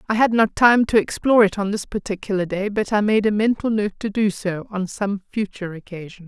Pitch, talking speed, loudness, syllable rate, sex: 205 Hz, 230 wpm, -20 LUFS, 5.7 syllables/s, female